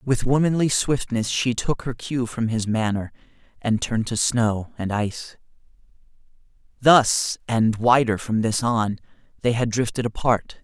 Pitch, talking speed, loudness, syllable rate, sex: 115 Hz, 145 wpm, -22 LUFS, 4.3 syllables/s, male